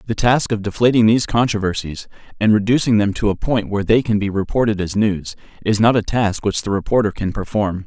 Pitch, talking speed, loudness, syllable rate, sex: 105 Hz, 215 wpm, -18 LUFS, 5.9 syllables/s, male